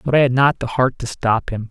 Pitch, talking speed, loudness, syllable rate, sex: 125 Hz, 315 wpm, -18 LUFS, 5.6 syllables/s, male